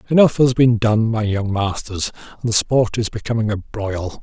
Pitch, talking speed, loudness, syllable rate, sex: 110 Hz, 200 wpm, -18 LUFS, 4.8 syllables/s, male